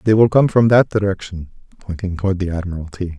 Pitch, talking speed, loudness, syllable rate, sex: 95 Hz, 190 wpm, -17 LUFS, 6.1 syllables/s, male